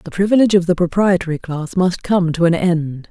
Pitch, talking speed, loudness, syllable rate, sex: 175 Hz, 215 wpm, -16 LUFS, 5.7 syllables/s, female